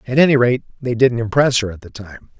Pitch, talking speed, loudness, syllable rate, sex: 120 Hz, 250 wpm, -16 LUFS, 6.0 syllables/s, male